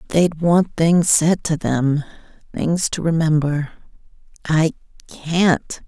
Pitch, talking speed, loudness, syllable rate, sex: 160 Hz, 90 wpm, -18 LUFS, 3.2 syllables/s, female